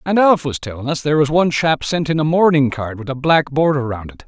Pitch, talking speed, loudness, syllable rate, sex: 145 Hz, 280 wpm, -17 LUFS, 6.0 syllables/s, male